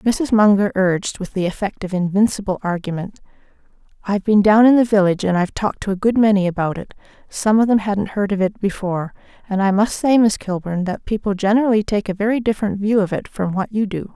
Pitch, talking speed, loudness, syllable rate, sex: 200 Hz, 210 wpm, -18 LUFS, 6.2 syllables/s, female